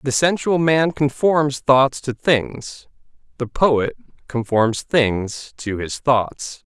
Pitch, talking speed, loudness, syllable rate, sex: 135 Hz, 125 wpm, -19 LUFS, 3.0 syllables/s, male